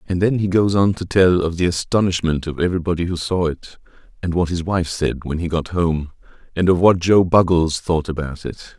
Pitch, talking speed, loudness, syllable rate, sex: 85 Hz, 220 wpm, -18 LUFS, 5.3 syllables/s, male